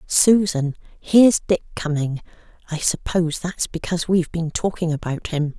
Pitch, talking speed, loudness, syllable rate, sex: 170 Hz, 140 wpm, -20 LUFS, 4.9 syllables/s, female